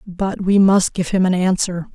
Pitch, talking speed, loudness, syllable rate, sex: 185 Hz, 215 wpm, -17 LUFS, 4.5 syllables/s, female